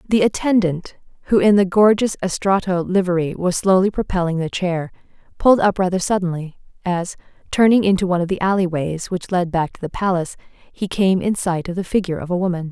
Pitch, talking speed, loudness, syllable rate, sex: 185 Hz, 195 wpm, -19 LUFS, 5.8 syllables/s, female